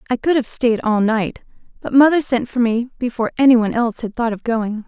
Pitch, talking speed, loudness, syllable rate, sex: 235 Hz, 235 wpm, -17 LUFS, 6.0 syllables/s, female